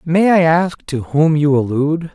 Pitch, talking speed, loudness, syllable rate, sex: 155 Hz, 195 wpm, -15 LUFS, 4.4 syllables/s, male